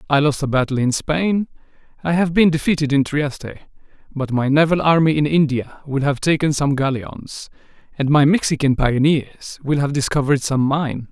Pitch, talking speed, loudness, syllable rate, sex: 145 Hz, 175 wpm, -18 LUFS, 5.2 syllables/s, male